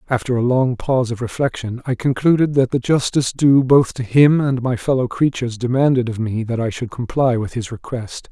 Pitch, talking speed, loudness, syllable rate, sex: 125 Hz, 210 wpm, -18 LUFS, 5.5 syllables/s, male